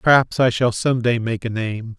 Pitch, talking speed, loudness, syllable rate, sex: 120 Hz, 240 wpm, -19 LUFS, 4.8 syllables/s, male